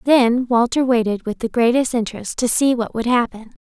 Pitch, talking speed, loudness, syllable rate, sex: 235 Hz, 195 wpm, -18 LUFS, 5.3 syllables/s, female